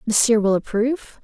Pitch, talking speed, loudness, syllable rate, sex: 225 Hz, 145 wpm, -19 LUFS, 5.6 syllables/s, female